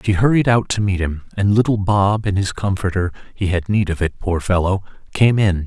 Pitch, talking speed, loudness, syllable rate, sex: 100 Hz, 210 wpm, -18 LUFS, 5.3 syllables/s, male